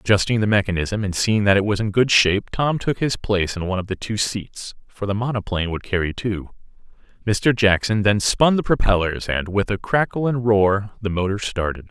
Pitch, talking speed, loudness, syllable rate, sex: 105 Hz, 210 wpm, -20 LUFS, 5.4 syllables/s, male